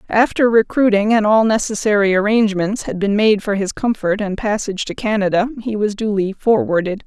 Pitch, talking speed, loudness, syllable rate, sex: 210 Hz, 170 wpm, -17 LUFS, 5.5 syllables/s, female